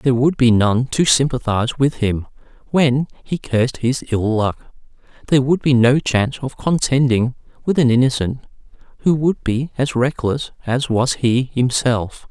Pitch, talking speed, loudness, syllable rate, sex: 125 Hz, 160 wpm, -18 LUFS, 4.7 syllables/s, male